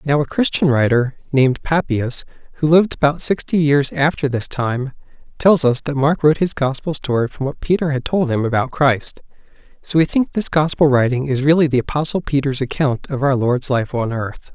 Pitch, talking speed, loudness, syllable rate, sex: 140 Hz, 200 wpm, -17 LUFS, 5.3 syllables/s, male